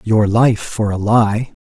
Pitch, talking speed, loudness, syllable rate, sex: 110 Hz, 185 wpm, -15 LUFS, 3.4 syllables/s, male